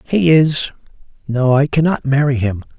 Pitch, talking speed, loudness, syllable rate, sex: 140 Hz, 130 wpm, -15 LUFS, 4.7 syllables/s, male